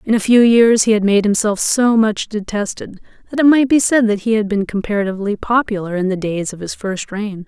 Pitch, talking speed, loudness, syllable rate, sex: 210 Hz, 235 wpm, -16 LUFS, 5.5 syllables/s, female